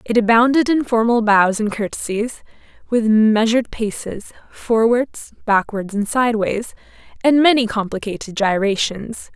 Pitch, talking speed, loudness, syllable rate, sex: 225 Hz, 115 wpm, -17 LUFS, 4.6 syllables/s, female